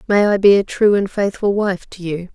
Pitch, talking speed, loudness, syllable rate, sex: 195 Hz, 255 wpm, -16 LUFS, 5.1 syllables/s, female